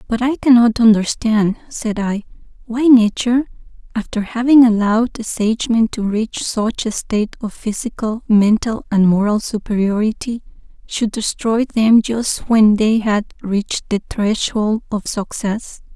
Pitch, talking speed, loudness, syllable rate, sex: 220 Hz, 135 wpm, -16 LUFS, 4.3 syllables/s, female